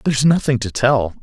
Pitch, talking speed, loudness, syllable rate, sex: 125 Hz, 195 wpm, -17 LUFS, 5.8 syllables/s, male